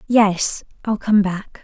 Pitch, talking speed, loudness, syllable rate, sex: 205 Hz, 110 wpm, -19 LUFS, 3.2 syllables/s, female